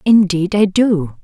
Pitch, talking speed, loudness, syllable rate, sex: 190 Hz, 145 wpm, -14 LUFS, 3.6 syllables/s, female